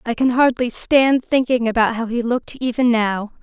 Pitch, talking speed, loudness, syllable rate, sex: 240 Hz, 195 wpm, -18 LUFS, 4.9 syllables/s, female